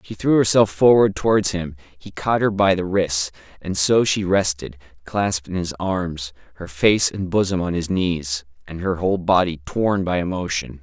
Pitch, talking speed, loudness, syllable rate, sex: 90 Hz, 190 wpm, -20 LUFS, 4.6 syllables/s, male